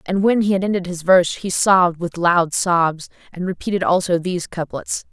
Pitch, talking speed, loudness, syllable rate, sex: 180 Hz, 200 wpm, -18 LUFS, 5.3 syllables/s, female